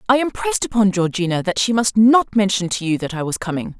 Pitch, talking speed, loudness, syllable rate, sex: 200 Hz, 235 wpm, -18 LUFS, 6.1 syllables/s, female